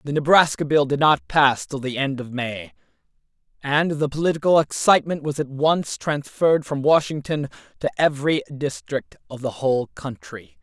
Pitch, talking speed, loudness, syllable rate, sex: 145 Hz, 160 wpm, -21 LUFS, 5.0 syllables/s, male